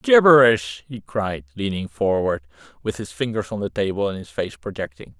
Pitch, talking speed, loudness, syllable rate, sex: 100 Hz, 175 wpm, -21 LUFS, 5.0 syllables/s, male